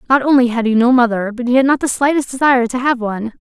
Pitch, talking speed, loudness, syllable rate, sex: 250 Hz, 280 wpm, -14 LUFS, 7.0 syllables/s, female